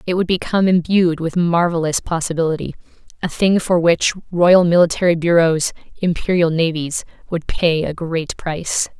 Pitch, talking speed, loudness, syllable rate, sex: 170 Hz, 140 wpm, -17 LUFS, 5.0 syllables/s, female